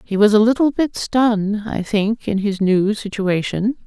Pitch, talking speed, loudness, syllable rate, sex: 210 Hz, 185 wpm, -18 LUFS, 4.4 syllables/s, female